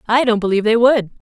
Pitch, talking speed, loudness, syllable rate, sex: 225 Hz, 225 wpm, -15 LUFS, 7.0 syllables/s, female